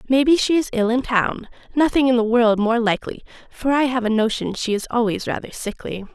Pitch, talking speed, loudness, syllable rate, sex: 240 Hz, 225 wpm, -20 LUFS, 5.7 syllables/s, female